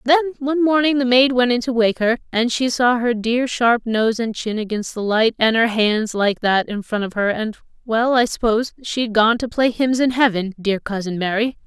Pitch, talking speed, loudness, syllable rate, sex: 235 Hz, 215 wpm, -18 LUFS, 5.0 syllables/s, female